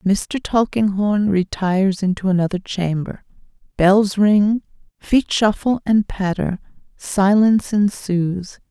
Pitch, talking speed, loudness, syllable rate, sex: 200 Hz, 95 wpm, -18 LUFS, 3.7 syllables/s, female